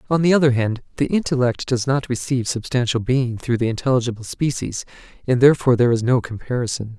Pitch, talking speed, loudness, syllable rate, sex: 125 Hz, 180 wpm, -20 LUFS, 6.4 syllables/s, male